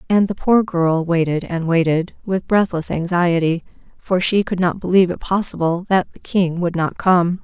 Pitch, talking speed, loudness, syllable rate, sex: 175 Hz, 180 wpm, -18 LUFS, 4.8 syllables/s, female